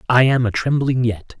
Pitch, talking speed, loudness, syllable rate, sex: 125 Hz, 170 wpm, -18 LUFS, 5.0 syllables/s, male